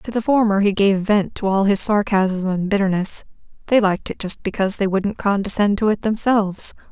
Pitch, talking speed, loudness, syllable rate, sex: 200 Hz, 210 wpm, -18 LUFS, 5.6 syllables/s, female